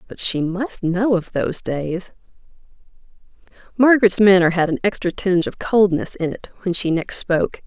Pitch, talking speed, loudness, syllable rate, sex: 185 Hz, 165 wpm, -19 LUFS, 5.1 syllables/s, female